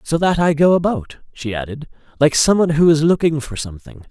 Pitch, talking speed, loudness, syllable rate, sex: 150 Hz, 205 wpm, -16 LUFS, 5.9 syllables/s, male